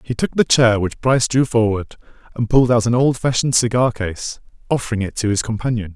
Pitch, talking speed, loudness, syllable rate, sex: 115 Hz, 200 wpm, -18 LUFS, 6.0 syllables/s, male